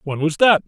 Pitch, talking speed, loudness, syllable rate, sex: 165 Hz, 265 wpm, -17 LUFS, 5.4 syllables/s, male